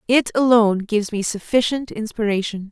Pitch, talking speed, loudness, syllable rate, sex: 220 Hz, 135 wpm, -19 LUFS, 5.5 syllables/s, female